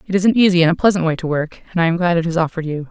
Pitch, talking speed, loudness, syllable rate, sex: 175 Hz, 370 wpm, -17 LUFS, 8.2 syllables/s, female